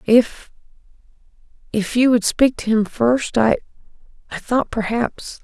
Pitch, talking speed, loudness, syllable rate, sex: 230 Hz, 100 wpm, -19 LUFS, 3.9 syllables/s, female